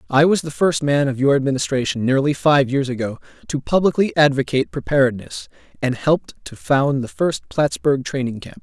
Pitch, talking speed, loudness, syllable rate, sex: 140 Hz, 175 wpm, -19 LUFS, 5.5 syllables/s, male